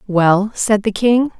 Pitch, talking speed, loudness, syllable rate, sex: 210 Hz, 170 wpm, -15 LUFS, 3.5 syllables/s, female